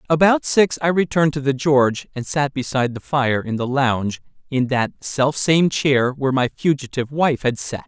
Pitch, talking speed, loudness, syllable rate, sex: 135 Hz, 185 wpm, -19 LUFS, 5.3 syllables/s, male